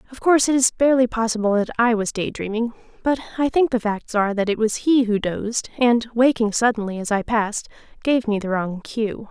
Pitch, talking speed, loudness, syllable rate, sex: 230 Hz, 215 wpm, -20 LUFS, 5.7 syllables/s, female